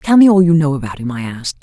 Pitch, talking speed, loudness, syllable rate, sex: 155 Hz, 335 wpm, -14 LUFS, 7.1 syllables/s, female